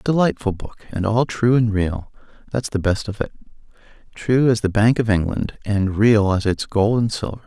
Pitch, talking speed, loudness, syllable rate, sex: 110 Hz, 200 wpm, -19 LUFS, 5.1 syllables/s, male